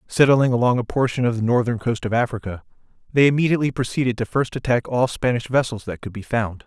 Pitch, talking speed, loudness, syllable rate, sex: 120 Hz, 205 wpm, -21 LUFS, 6.3 syllables/s, male